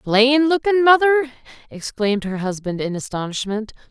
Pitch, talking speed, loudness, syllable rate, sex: 240 Hz, 125 wpm, -18 LUFS, 5.3 syllables/s, female